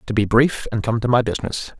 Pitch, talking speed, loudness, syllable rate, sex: 115 Hz, 265 wpm, -19 LUFS, 6.1 syllables/s, male